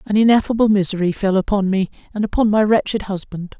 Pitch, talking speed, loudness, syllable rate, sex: 205 Hz, 185 wpm, -18 LUFS, 6.2 syllables/s, female